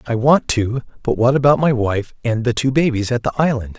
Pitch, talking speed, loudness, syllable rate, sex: 125 Hz, 240 wpm, -17 LUFS, 5.4 syllables/s, male